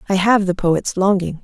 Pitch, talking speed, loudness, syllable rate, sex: 190 Hz, 210 wpm, -17 LUFS, 4.9 syllables/s, female